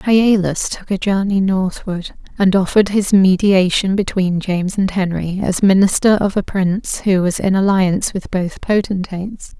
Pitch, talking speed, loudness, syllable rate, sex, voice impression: 190 Hz, 155 wpm, -16 LUFS, 4.7 syllables/s, female, very feminine, very adult-like, slightly thin, slightly relaxed, slightly weak, slightly bright, soft, clear, fluent, slightly raspy, cute, intellectual, refreshing, very sincere, very calm, friendly, reassuring, slightly unique, elegant, slightly wild, sweet, slightly lively, kind, modest, slightly light